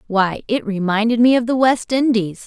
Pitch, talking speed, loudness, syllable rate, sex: 225 Hz, 195 wpm, -17 LUFS, 4.9 syllables/s, female